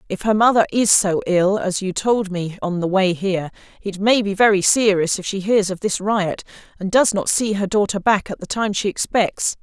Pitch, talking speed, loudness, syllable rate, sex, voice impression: 200 Hz, 230 wpm, -18 LUFS, 5.0 syllables/s, female, feminine, very adult-like, slightly powerful, intellectual, slightly intense, slightly sharp